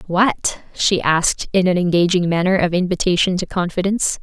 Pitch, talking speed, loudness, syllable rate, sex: 180 Hz, 155 wpm, -17 LUFS, 5.3 syllables/s, female